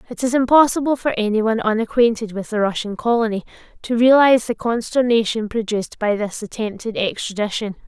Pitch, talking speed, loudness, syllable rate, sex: 225 Hz, 145 wpm, -19 LUFS, 5.9 syllables/s, female